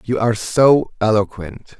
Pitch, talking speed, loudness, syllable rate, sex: 110 Hz, 135 wpm, -16 LUFS, 4.3 syllables/s, male